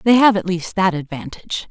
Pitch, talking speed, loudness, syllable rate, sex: 190 Hz, 210 wpm, -18 LUFS, 5.7 syllables/s, female